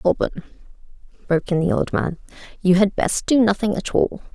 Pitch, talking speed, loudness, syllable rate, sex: 195 Hz, 180 wpm, -20 LUFS, 5.5 syllables/s, female